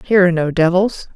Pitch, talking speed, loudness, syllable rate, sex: 180 Hz, 210 wpm, -15 LUFS, 6.9 syllables/s, female